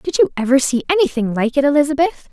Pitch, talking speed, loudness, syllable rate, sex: 280 Hz, 205 wpm, -16 LUFS, 6.8 syllables/s, female